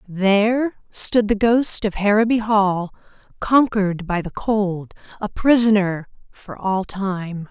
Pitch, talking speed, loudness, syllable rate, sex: 205 Hz, 130 wpm, -19 LUFS, 3.7 syllables/s, female